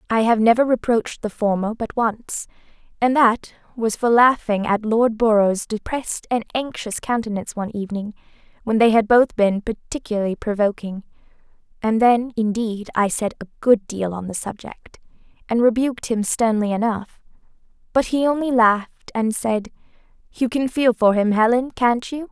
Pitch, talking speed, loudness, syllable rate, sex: 225 Hz, 155 wpm, -20 LUFS, 5.0 syllables/s, female